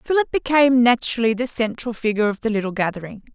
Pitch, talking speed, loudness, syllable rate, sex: 235 Hz, 180 wpm, -20 LUFS, 6.8 syllables/s, female